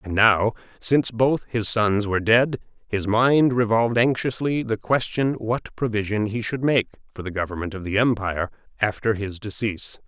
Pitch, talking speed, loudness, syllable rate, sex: 110 Hz, 165 wpm, -22 LUFS, 5.0 syllables/s, male